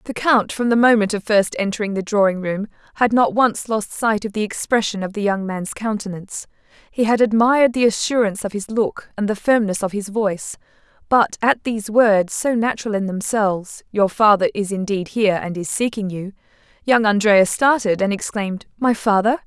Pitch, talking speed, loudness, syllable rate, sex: 210 Hz, 190 wpm, -19 LUFS, 5.4 syllables/s, female